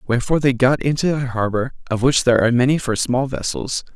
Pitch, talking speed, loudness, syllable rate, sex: 130 Hz, 215 wpm, -18 LUFS, 6.5 syllables/s, male